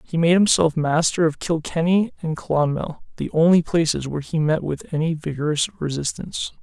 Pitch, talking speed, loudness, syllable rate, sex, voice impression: 160 Hz, 165 wpm, -21 LUFS, 5.2 syllables/s, male, very masculine, adult-like, slightly thick, slightly dark, slightly muffled, sincere, slightly calm, slightly unique